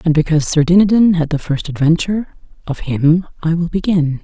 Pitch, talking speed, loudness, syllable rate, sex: 165 Hz, 185 wpm, -15 LUFS, 5.7 syllables/s, female